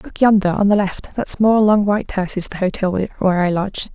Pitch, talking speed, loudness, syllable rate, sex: 200 Hz, 245 wpm, -17 LUFS, 6.1 syllables/s, female